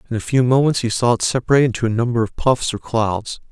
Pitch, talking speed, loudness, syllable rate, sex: 120 Hz, 255 wpm, -18 LUFS, 6.5 syllables/s, male